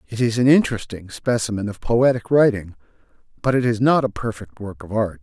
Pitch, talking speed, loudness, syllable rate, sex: 115 Hz, 195 wpm, -20 LUFS, 5.6 syllables/s, male